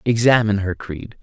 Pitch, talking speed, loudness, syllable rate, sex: 105 Hz, 145 wpm, -18 LUFS, 5.4 syllables/s, male